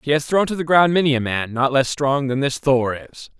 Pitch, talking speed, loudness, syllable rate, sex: 140 Hz, 285 wpm, -19 LUFS, 5.3 syllables/s, male